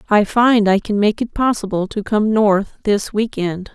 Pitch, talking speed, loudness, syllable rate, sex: 210 Hz, 210 wpm, -17 LUFS, 4.4 syllables/s, female